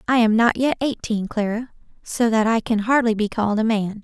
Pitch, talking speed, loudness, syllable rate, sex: 225 Hz, 225 wpm, -20 LUFS, 5.4 syllables/s, female